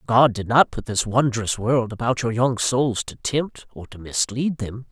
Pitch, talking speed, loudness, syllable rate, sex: 120 Hz, 210 wpm, -21 LUFS, 4.3 syllables/s, male